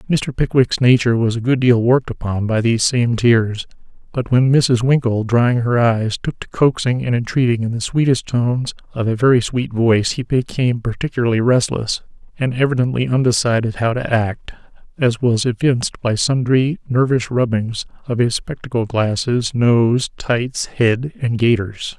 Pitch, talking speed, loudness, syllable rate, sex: 120 Hz, 165 wpm, -17 LUFS, 4.9 syllables/s, male